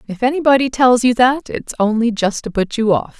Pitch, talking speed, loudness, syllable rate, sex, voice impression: 235 Hz, 225 wpm, -15 LUFS, 5.4 syllables/s, female, very feminine, very adult-like, slightly clear, intellectual, elegant